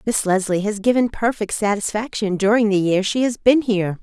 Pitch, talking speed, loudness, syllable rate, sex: 210 Hz, 195 wpm, -19 LUFS, 5.4 syllables/s, female